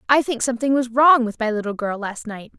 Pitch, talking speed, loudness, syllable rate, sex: 240 Hz, 255 wpm, -19 LUFS, 5.9 syllables/s, female